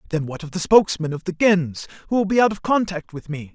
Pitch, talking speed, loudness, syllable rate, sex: 175 Hz, 270 wpm, -20 LUFS, 6.2 syllables/s, male